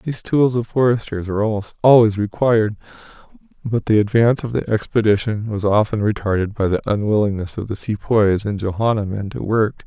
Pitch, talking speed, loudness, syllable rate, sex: 110 Hz, 170 wpm, -18 LUFS, 5.7 syllables/s, male